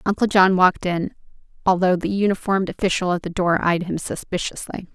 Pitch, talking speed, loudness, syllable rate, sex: 185 Hz, 170 wpm, -20 LUFS, 5.8 syllables/s, female